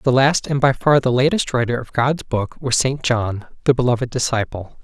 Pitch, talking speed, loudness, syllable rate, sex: 125 Hz, 210 wpm, -19 LUFS, 5.1 syllables/s, male